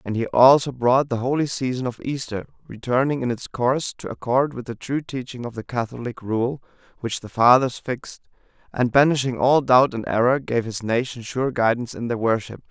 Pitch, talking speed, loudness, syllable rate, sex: 125 Hz, 195 wpm, -21 LUFS, 5.4 syllables/s, male